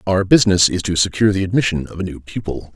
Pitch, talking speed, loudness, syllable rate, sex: 95 Hz, 240 wpm, -17 LUFS, 6.9 syllables/s, male